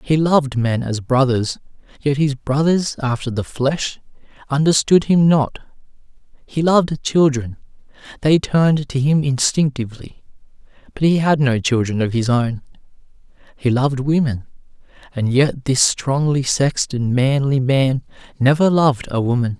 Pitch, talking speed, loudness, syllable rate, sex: 135 Hz, 130 wpm, -17 LUFS, 4.6 syllables/s, male